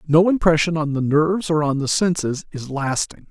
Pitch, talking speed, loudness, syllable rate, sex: 155 Hz, 200 wpm, -20 LUFS, 5.1 syllables/s, male